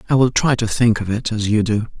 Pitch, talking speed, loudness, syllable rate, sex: 115 Hz, 300 wpm, -18 LUFS, 5.9 syllables/s, male